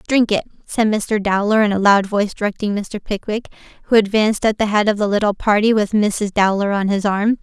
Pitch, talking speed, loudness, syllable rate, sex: 210 Hz, 220 wpm, -17 LUFS, 5.7 syllables/s, female